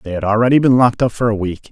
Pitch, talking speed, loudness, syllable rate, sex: 110 Hz, 315 wpm, -15 LUFS, 7.5 syllables/s, male